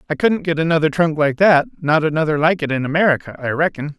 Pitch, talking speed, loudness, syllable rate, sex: 155 Hz, 210 wpm, -17 LUFS, 6.4 syllables/s, male